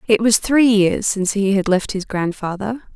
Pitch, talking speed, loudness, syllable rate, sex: 205 Hz, 205 wpm, -17 LUFS, 4.9 syllables/s, female